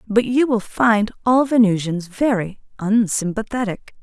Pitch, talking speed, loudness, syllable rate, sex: 220 Hz, 120 wpm, -19 LUFS, 4.2 syllables/s, female